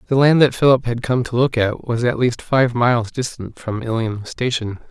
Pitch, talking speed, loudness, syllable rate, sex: 120 Hz, 220 wpm, -18 LUFS, 5.0 syllables/s, male